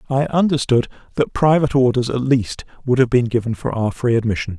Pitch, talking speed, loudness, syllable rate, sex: 125 Hz, 195 wpm, -18 LUFS, 5.9 syllables/s, male